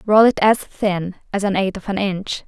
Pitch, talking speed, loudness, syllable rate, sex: 200 Hz, 245 wpm, -19 LUFS, 4.7 syllables/s, female